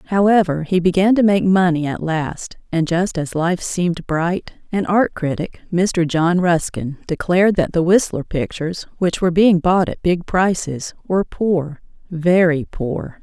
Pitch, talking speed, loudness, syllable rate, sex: 175 Hz, 160 wpm, -18 LUFS, 4.3 syllables/s, female